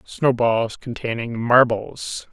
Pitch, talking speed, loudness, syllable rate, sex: 120 Hz, 105 wpm, -20 LUFS, 3.2 syllables/s, male